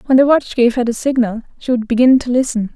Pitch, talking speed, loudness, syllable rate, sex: 245 Hz, 260 wpm, -15 LUFS, 6.2 syllables/s, female